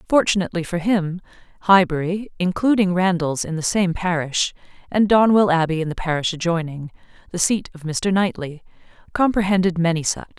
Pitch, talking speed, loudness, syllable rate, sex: 180 Hz, 145 wpm, -20 LUFS, 5.5 syllables/s, female